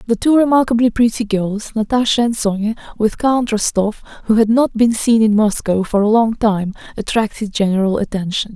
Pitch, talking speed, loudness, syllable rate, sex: 220 Hz, 175 wpm, -16 LUFS, 5.2 syllables/s, female